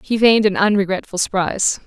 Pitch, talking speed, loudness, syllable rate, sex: 200 Hz, 160 wpm, -17 LUFS, 6.4 syllables/s, female